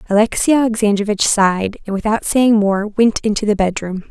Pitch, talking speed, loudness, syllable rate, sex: 210 Hz, 160 wpm, -16 LUFS, 5.5 syllables/s, female